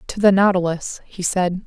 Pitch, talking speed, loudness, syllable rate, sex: 185 Hz, 180 wpm, -19 LUFS, 4.7 syllables/s, female